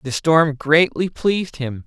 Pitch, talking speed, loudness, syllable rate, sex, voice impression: 150 Hz, 160 wpm, -18 LUFS, 4.0 syllables/s, male, masculine, adult-like, tensed, powerful, clear, halting, calm, friendly, lively, kind, slightly modest